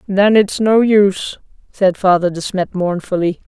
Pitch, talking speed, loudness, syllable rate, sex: 190 Hz, 150 wpm, -15 LUFS, 4.4 syllables/s, female